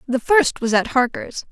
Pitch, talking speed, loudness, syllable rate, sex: 265 Hz, 200 wpm, -18 LUFS, 4.5 syllables/s, female